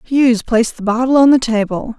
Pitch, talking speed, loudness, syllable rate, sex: 240 Hz, 210 wpm, -14 LUFS, 5.9 syllables/s, female